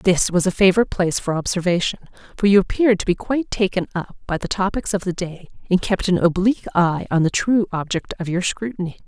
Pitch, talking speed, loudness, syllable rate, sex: 190 Hz, 220 wpm, -20 LUFS, 6.3 syllables/s, female